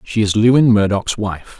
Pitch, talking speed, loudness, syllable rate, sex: 110 Hz, 190 wpm, -15 LUFS, 4.7 syllables/s, male